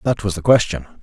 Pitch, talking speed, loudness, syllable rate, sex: 100 Hz, 235 wpm, -17 LUFS, 6.3 syllables/s, male